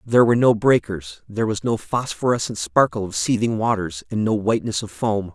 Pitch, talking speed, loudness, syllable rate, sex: 110 Hz, 190 wpm, -21 LUFS, 5.7 syllables/s, male